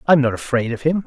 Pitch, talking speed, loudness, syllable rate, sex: 140 Hz, 335 wpm, -19 LUFS, 7.5 syllables/s, male